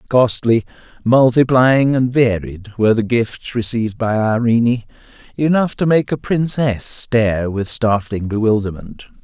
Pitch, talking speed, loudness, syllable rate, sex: 115 Hz, 125 wpm, -16 LUFS, 4.5 syllables/s, male